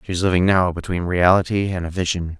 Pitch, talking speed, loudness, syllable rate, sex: 90 Hz, 225 wpm, -19 LUFS, 6.2 syllables/s, male